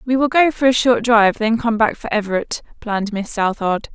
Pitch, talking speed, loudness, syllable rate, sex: 225 Hz, 230 wpm, -17 LUFS, 5.5 syllables/s, female